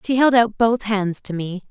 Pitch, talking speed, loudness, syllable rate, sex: 215 Hz, 245 wpm, -19 LUFS, 4.7 syllables/s, female